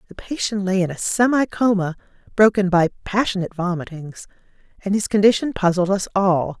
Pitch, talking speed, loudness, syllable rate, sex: 195 Hz, 155 wpm, -19 LUFS, 5.6 syllables/s, female